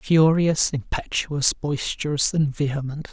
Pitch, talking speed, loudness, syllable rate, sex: 145 Hz, 95 wpm, -22 LUFS, 3.9 syllables/s, male